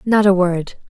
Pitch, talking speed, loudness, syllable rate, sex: 190 Hz, 200 wpm, -16 LUFS, 4.2 syllables/s, female